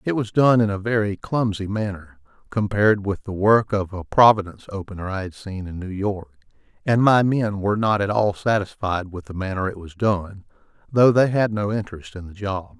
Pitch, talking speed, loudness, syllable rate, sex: 100 Hz, 205 wpm, -21 LUFS, 5.3 syllables/s, male